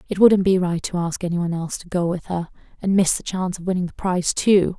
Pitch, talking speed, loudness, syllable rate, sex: 180 Hz, 275 wpm, -21 LUFS, 6.4 syllables/s, female